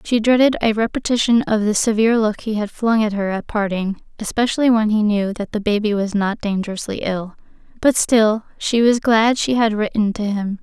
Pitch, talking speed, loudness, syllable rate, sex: 215 Hz, 205 wpm, -18 LUFS, 5.3 syllables/s, female